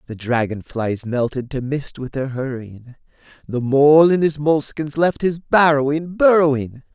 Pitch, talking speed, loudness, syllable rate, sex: 140 Hz, 155 wpm, -18 LUFS, 4.5 syllables/s, male